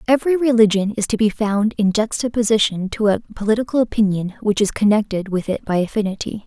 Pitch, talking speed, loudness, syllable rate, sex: 215 Hz, 175 wpm, -18 LUFS, 6.2 syllables/s, female